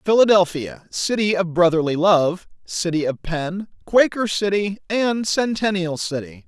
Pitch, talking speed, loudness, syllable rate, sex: 185 Hz, 120 wpm, -20 LUFS, 4.3 syllables/s, male